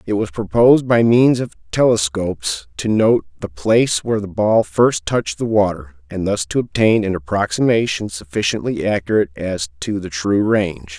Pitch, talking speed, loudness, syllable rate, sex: 100 Hz, 170 wpm, -17 LUFS, 5.1 syllables/s, male